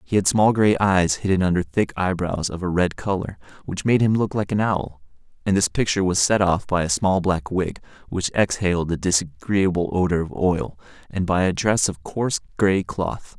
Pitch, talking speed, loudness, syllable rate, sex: 95 Hz, 205 wpm, -21 LUFS, 5.0 syllables/s, male